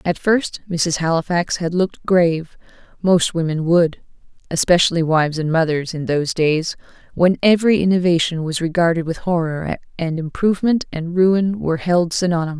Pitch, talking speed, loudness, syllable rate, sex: 170 Hz, 145 wpm, -18 LUFS, 5.2 syllables/s, female